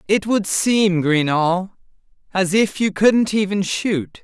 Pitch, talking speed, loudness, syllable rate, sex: 195 Hz, 140 wpm, -18 LUFS, 3.4 syllables/s, male